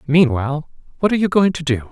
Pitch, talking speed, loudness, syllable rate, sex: 155 Hz, 220 wpm, -18 LUFS, 6.9 syllables/s, male